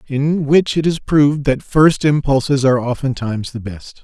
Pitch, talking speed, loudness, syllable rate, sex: 140 Hz, 180 wpm, -16 LUFS, 4.9 syllables/s, male